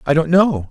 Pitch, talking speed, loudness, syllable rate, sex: 160 Hz, 255 wpm, -15 LUFS, 5.2 syllables/s, male